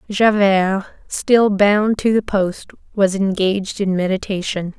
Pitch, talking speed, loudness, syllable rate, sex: 200 Hz, 125 wpm, -17 LUFS, 3.9 syllables/s, female